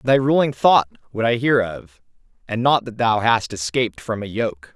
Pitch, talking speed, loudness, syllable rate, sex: 115 Hz, 200 wpm, -19 LUFS, 4.8 syllables/s, male